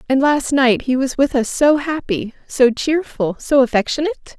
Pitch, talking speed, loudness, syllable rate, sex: 265 Hz, 180 wpm, -17 LUFS, 5.0 syllables/s, female